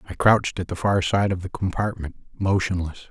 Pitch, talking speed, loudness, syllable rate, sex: 95 Hz, 195 wpm, -23 LUFS, 5.8 syllables/s, male